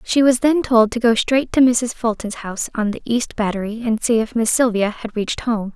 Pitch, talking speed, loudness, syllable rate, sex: 230 Hz, 240 wpm, -18 LUFS, 5.2 syllables/s, female